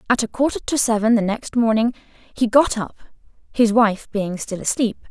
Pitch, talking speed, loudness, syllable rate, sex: 225 Hz, 190 wpm, -19 LUFS, 5.1 syllables/s, female